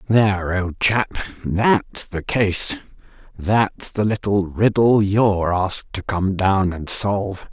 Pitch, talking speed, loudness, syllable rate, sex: 100 Hz, 130 wpm, -20 LUFS, 3.6 syllables/s, female